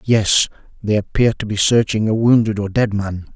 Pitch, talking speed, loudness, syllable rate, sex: 110 Hz, 195 wpm, -17 LUFS, 4.8 syllables/s, male